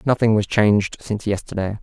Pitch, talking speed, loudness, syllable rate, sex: 105 Hz, 165 wpm, -20 LUFS, 5.9 syllables/s, male